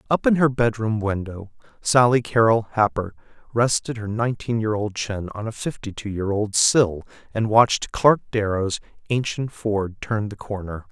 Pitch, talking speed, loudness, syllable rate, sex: 110 Hz, 165 wpm, -22 LUFS, 4.7 syllables/s, male